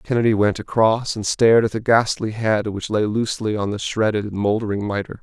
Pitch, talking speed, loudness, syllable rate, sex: 110 Hz, 205 wpm, -20 LUFS, 5.7 syllables/s, male